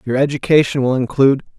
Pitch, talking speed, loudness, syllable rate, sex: 135 Hz, 150 wpm, -15 LUFS, 6.8 syllables/s, male